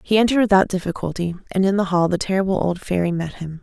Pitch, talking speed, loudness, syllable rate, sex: 185 Hz, 230 wpm, -20 LUFS, 6.8 syllables/s, female